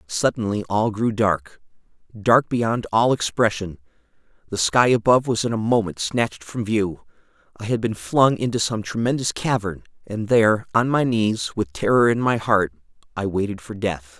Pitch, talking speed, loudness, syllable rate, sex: 110 Hz, 165 wpm, -21 LUFS, 4.8 syllables/s, male